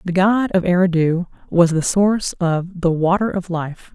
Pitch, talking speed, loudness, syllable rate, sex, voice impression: 180 Hz, 180 wpm, -18 LUFS, 4.4 syllables/s, female, feminine, adult-like, slightly relaxed, bright, soft, slightly muffled, slightly raspy, intellectual, calm, friendly, reassuring, kind